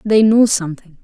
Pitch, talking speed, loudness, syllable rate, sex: 200 Hz, 175 wpm, -13 LUFS, 5.6 syllables/s, female